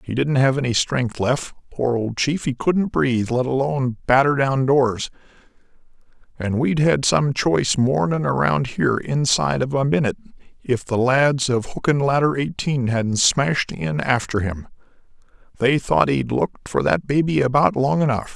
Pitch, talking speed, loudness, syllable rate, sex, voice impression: 130 Hz, 170 wpm, -20 LUFS, 4.8 syllables/s, male, masculine, adult-like, cool, sincere, friendly, slightly kind